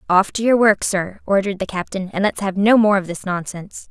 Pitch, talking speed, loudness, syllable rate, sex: 195 Hz, 245 wpm, -18 LUFS, 5.7 syllables/s, female